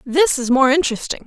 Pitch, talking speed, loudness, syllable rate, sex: 280 Hz, 190 wpm, -16 LUFS, 6.0 syllables/s, female